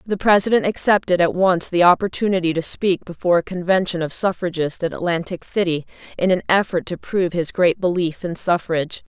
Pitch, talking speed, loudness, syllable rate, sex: 180 Hz, 175 wpm, -19 LUFS, 5.7 syllables/s, female